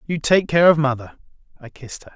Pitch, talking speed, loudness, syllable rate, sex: 145 Hz, 225 wpm, -17 LUFS, 6.6 syllables/s, male